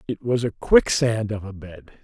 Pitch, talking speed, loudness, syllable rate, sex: 110 Hz, 205 wpm, -21 LUFS, 4.5 syllables/s, male